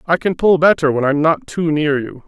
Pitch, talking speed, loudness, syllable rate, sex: 155 Hz, 265 wpm, -15 LUFS, 5.1 syllables/s, male